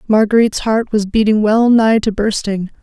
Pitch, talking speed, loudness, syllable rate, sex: 215 Hz, 170 wpm, -14 LUFS, 5.0 syllables/s, female